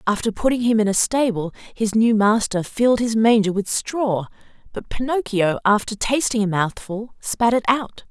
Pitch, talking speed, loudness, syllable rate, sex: 220 Hz, 170 wpm, -20 LUFS, 4.7 syllables/s, female